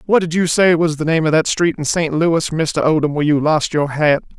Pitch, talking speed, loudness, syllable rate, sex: 160 Hz, 275 wpm, -16 LUFS, 5.4 syllables/s, male